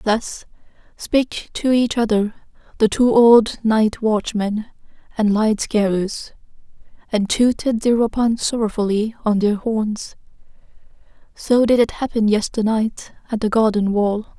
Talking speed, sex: 125 wpm, female